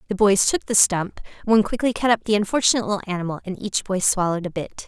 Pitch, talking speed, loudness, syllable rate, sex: 200 Hz, 235 wpm, -21 LUFS, 6.8 syllables/s, female